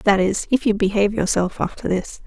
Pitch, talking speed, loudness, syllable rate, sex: 205 Hz, 210 wpm, -20 LUFS, 6.1 syllables/s, female